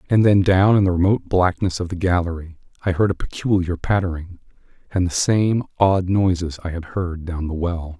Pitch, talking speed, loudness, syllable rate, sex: 90 Hz, 195 wpm, -20 LUFS, 5.3 syllables/s, male